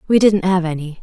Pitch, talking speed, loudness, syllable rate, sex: 180 Hz, 235 wpm, -16 LUFS, 5.8 syllables/s, female